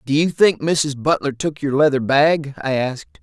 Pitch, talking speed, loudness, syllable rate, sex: 140 Hz, 205 wpm, -18 LUFS, 4.6 syllables/s, male